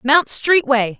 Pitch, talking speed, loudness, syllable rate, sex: 270 Hz, 180 wpm, -15 LUFS, 3.4 syllables/s, female